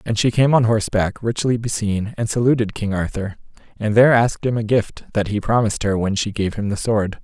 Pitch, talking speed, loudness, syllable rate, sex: 110 Hz, 225 wpm, -19 LUFS, 5.8 syllables/s, male